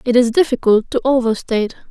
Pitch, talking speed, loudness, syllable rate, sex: 245 Hz, 155 wpm, -16 LUFS, 6.1 syllables/s, female